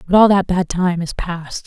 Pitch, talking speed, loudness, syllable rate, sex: 180 Hz, 255 wpm, -17 LUFS, 4.6 syllables/s, female